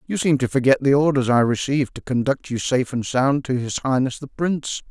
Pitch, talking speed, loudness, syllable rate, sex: 135 Hz, 235 wpm, -20 LUFS, 5.7 syllables/s, male